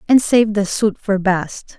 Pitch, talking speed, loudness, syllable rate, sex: 205 Hz, 200 wpm, -16 LUFS, 3.7 syllables/s, female